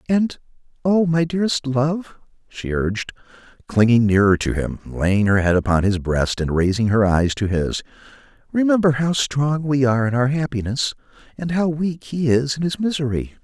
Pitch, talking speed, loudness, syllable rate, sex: 130 Hz, 175 wpm, -20 LUFS, 5.0 syllables/s, male